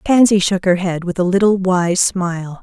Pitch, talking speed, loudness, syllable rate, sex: 185 Hz, 205 wpm, -15 LUFS, 4.7 syllables/s, female